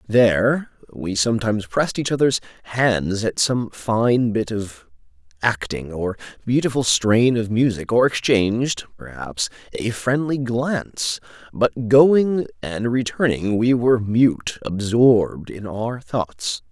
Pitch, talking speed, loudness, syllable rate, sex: 115 Hz, 125 wpm, -20 LUFS, 3.9 syllables/s, male